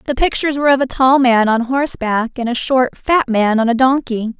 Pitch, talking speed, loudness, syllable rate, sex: 250 Hz, 230 wpm, -15 LUFS, 5.4 syllables/s, female